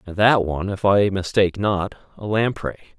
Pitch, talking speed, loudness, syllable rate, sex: 100 Hz, 180 wpm, -20 LUFS, 5.2 syllables/s, male